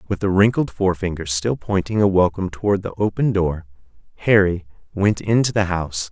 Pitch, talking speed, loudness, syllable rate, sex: 95 Hz, 165 wpm, -20 LUFS, 5.7 syllables/s, male